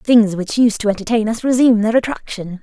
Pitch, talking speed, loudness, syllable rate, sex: 220 Hz, 205 wpm, -16 LUFS, 5.8 syllables/s, female